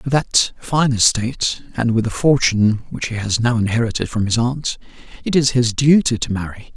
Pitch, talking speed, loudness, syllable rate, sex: 120 Hz, 180 wpm, -18 LUFS, 5.2 syllables/s, male